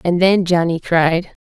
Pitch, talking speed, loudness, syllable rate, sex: 175 Hz, 170 wpm, -16 LUFS, 3.9 syllables/s, female